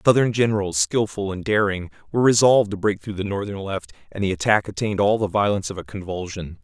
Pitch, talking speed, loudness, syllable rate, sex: 100 Hz, 215 wpm, -21 LUFS, 6.6 syllables/s, male